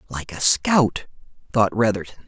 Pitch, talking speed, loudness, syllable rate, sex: 115 Hz, 130 wpm, -20 LUFS, 4.6 syllables/s, male